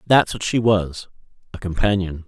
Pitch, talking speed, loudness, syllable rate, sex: 95 Hz, 130 wpm, -20 LUFS, 4.7 syllables/s, male